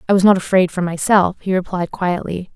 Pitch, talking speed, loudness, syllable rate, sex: 185 Hz, 210 wpm, -17 LUFS, 5.6 syllables/s, female